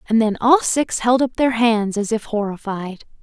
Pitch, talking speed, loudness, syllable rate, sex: 230 Hz, 205 wpm, -18 LUFS, 4.6 syllables/s, female